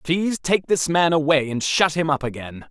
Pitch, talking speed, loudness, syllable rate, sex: 155 Hz, 220 wpm, -20 LUFS, 5.1 syllables/s, male